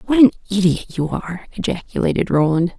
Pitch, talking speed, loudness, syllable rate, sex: 185 Hz, 150 wpm, -18 LUFS, 6.0 syllables/s, female